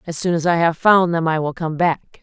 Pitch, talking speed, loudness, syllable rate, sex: 165 Hz, 295 wpm, -18 LUFS, 5.3 syllables/s, female